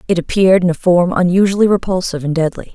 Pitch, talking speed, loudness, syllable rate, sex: 180 Hz, 195 wpm, -14 LUFS, 7.0 syllables/s, female